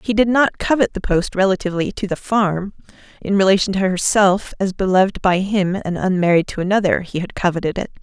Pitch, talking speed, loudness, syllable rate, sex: 195 Hz, 195 wpm, -18 LUFS, 5.8 syllables/s, female